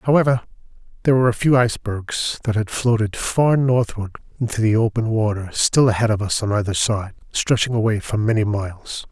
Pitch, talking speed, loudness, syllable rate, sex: 110 Hz, 180 wpm, -19 LUFS, 5.6 syllables/s, male